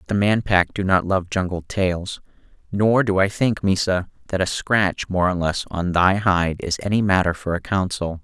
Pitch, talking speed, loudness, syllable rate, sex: 95 Hz, 205 wpm, -20 LUFS, 4.6 syllables/s, male